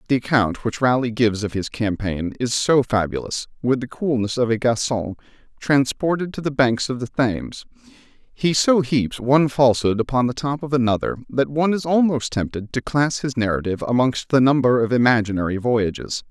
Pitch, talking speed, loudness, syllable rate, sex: 125 Hz, 180 wpm, -20 LUFS, 5.4 syllables/s, male